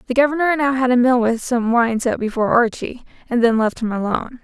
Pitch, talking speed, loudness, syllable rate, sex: 240 Hz, 230 wpm, -18 LUFS, 6.0 syllables/s, female